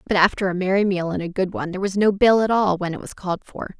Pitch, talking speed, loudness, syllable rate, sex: 190 Hz, 315 wpm, -21 LUFS, 7.0 syllables/s, female